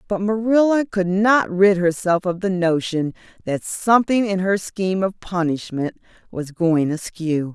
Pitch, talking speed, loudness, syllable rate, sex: 185 Hz, 150 wpm, -20 LUFS, 4.3 syllables/s, female